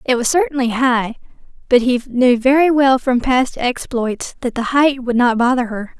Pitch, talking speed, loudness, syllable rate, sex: 250 Hz, 190 wpm, -16 LUFS, 4.6 syllables/s, female